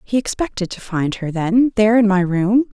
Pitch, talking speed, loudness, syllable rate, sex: 205 Hz, 215 wpm, -17 LUFS, 5.2 syllables/s, female